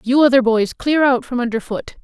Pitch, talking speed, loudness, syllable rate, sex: 250 Hz, 235 wpm, -16 LUFS, 5.3 syllables/s, female